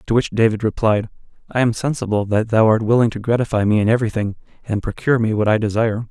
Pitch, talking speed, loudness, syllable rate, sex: 110 Hz, 225 wpm, -18 LUFS, 6.7 syllables/s, male